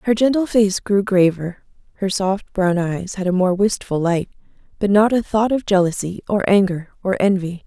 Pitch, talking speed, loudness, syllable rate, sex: 195 Hz, 190 wpm, -18 LUFS, 4.8 syllables/s, female